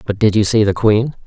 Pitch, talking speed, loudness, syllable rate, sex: 110 Hz, 285 wpm, -14 LUFS, 5.7 syllables/s, male